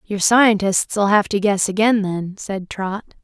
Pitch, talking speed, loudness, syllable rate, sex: 205 Hz, 165 wpm, -18 LUFS, 3.8 syllables/s, female